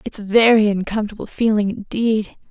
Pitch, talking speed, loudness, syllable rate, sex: 210 Hz, 120 wpm, -18 LUFS, 5.2 syllables/s, female